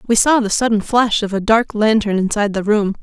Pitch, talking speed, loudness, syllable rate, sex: 215 Hz, 240 wpm, -16 LUFS, 5.7 syllables/s, female